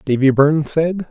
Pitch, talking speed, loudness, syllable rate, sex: 150 Hz, 165 wpm, -15 LUFS, 5.0 syllables/s, male